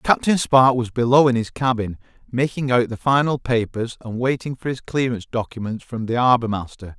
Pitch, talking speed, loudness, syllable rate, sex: 120 Hz, 190 wpm, -20 LUFS, 5.3 syllables/s, male